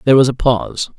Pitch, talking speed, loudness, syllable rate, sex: 125 Hz, 245 wpm, -15 LUFS, 7.3 syllables/s, male